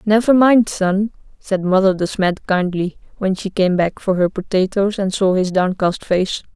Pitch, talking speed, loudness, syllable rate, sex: 195 Hz, 185 wpm, -17 LUFS, 4.4 syllables/s, female